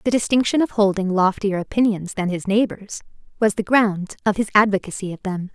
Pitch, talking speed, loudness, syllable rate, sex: 205 Hz, 185 wpm, -20 LUFS, 5.5 syllables/s, female